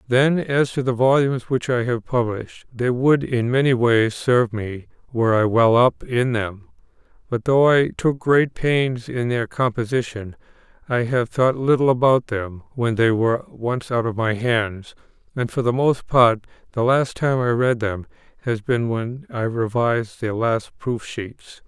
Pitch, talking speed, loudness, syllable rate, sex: 120 Hz, 180 wpm, -20 LUFS, 4.3 syllables/s, male